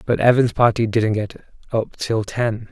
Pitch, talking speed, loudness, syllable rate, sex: 115 Hz, 175 wpm, -19 LUFS, 4.3 syllables/s, male